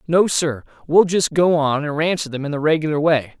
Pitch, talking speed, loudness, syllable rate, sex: 155 Hz, 230 wpm, -18 LUFS, 5.4 syllables/s, male